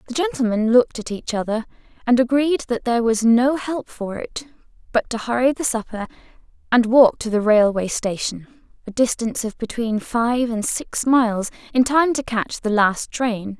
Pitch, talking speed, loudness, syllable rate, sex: 235 Hz, 170 wpm, -20 LUFS, 4.8 syllables/s, female